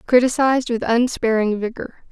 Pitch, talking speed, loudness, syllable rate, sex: 235 Hz, 115 wpm, -19 LUFS, 5.3 syllables/s, female